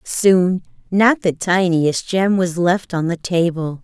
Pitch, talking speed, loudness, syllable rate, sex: 180 Hz, 155 wpm, -17 LUFS, 3.5 syllables/s, female